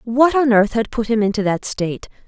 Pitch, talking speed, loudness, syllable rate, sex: 225 Hz, 235 wpm, -17 LUFS, 5.5 syllables/s, female